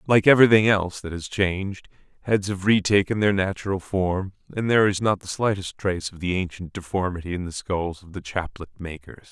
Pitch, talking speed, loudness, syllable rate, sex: 95 Hz, 200 wpm, -23 LUFS, 5.7 syllables/s, male